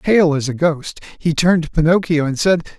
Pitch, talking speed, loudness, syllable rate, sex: 160 Hz, 215 wpm, -16 LUFS, 5.5 syllables/s, male